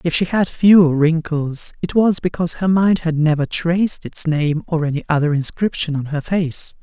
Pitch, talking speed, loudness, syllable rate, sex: 165 Hz, 195 wpm, -17 LUFS, 4.8 syllables/s, female